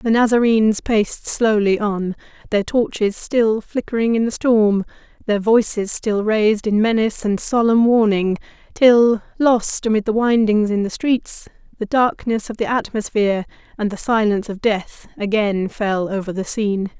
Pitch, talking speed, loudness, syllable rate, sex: 215 Hz, 155 wpm, -18 LUFS, 4.7 syllables/s, female